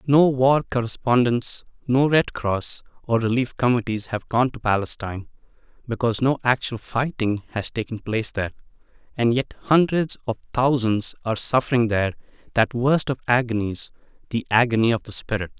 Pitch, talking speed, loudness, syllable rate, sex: 120 Hz, 145 wpm, -22 LUFS, 5.3 syllables/s, male